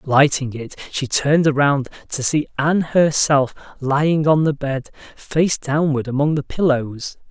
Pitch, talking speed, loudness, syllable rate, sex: 145 Hz, 150 wpm, -18 LUFS, 4.4 syllables/s, male